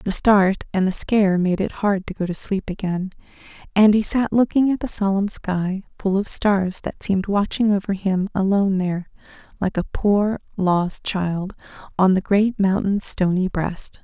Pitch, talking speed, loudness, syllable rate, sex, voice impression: 195 Hz, 180 wpm, -20 LUFS, 4.5 syllables/s, female, feminine, adult-like, tensed, powerful, bright, clear, fluent, intellectual, calm, reassuring, elegant, kind